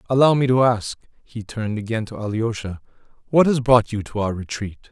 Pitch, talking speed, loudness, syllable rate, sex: 115 Hz, 185 wpm, -20 LUFS, 5.7 syllables/s, male